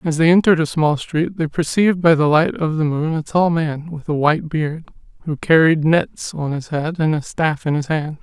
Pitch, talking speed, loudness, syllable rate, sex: 155 Hz, 240 wpm, -18 LUFS, 5.1 syllables/s, male